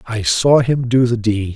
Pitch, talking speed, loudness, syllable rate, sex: 120 Hz, 230 wpm, -15 LUFS, 4.4 syllables/s, male